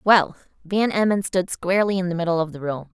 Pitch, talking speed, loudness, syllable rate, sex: 185 Hz, 220 wpm, -22 LUFS, 5.9 syllables/s, female